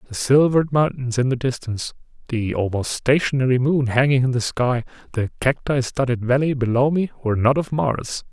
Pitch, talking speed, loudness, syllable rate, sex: 130 Hz, 175 wpm, -20 LUFS, 5.4 syllables/s, male